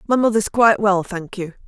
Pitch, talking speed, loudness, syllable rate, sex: 205 Hz, 215 wpm, -17 LUFS, 5.7 syllables/s, female